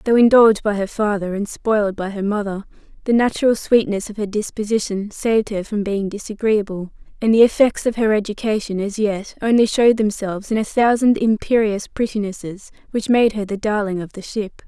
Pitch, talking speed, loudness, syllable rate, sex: 210 Hz, 185 wpm, -19 LUFS, 5.6 syllables/s, female